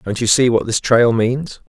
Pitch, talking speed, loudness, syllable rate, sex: 120 Hz, 240 wpm, -15 LUFS, 4.5 syllables/s, male